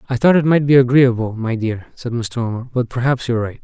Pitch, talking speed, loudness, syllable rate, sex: 120 Hz, 250 wpm, -17 LUFS, 6.0 syllables/s, male